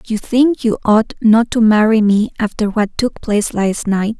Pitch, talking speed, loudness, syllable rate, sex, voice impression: 220 Hz, 200 wpm, -14 LUFS, 4.5 syllables/s, female, feminine, slightly adult-like, slightly cute, slightly refreshing, friendly, slightly reassuring, kind